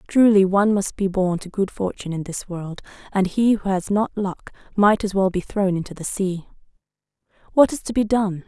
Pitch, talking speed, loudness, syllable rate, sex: 195 Hz, 210 wpm, -21 LUFS, 5.3 syllables/s, female